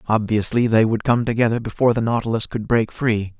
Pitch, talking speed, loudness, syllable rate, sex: 115 Hz, 195 wpm, -19 LUFS, 6.0 syllables/s, male